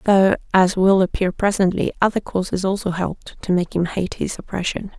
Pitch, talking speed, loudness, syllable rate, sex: 190 Hz, 180 wpm, -20 LUFS, 5.4 syllables/s, female